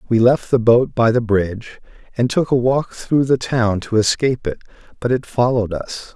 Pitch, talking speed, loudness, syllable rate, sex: 120 Hz, 205 wpm, -17 LUFS, 5.0 syllables/s, male